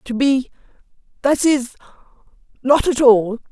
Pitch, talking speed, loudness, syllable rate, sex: 260 Hz, 100 wpm, -17 LUFS, 4.0 syllables/s, female